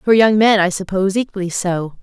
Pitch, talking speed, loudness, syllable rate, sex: 195 Hz, 205 wpm, -16 LUFS, 5.7 syllables/s, female